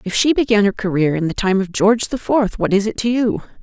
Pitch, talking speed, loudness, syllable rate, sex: 210 Hz, 280 wpm, -17 LUFS, 5.9 syllables/s, female